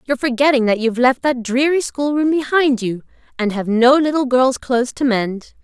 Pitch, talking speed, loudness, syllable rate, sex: 255 Hz, 190 wpm, -17 LUFS, 5.4 syllables/s, female